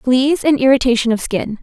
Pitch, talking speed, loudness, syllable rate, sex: 255 Hz, 185 wpm, -15 LUFS, 5.1 syllables/s, female